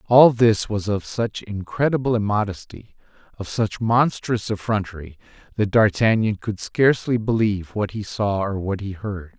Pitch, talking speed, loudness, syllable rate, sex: 105 Hz, 145 wpm, -21 LUFS, 4.6 syllables/s, male